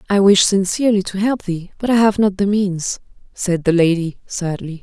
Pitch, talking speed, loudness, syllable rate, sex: 190 Hz, 200 wpm, -17 LUFS, 5.0 syllables/s, female